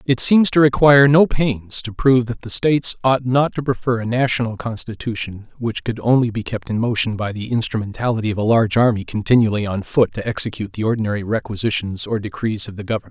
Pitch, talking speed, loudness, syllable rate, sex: 115 Hz, 205 wpm, -18 LUFS, 6.1 syllables/s, male